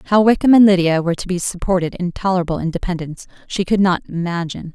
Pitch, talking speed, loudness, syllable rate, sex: 180 Hz, 190 wpm, -17 LUFS, 6.8 syllables/s, female